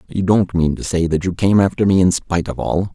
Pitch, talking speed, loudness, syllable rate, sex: 90 Hz, 285 wpm, -17 LUFS, 5.8 syllables/s, male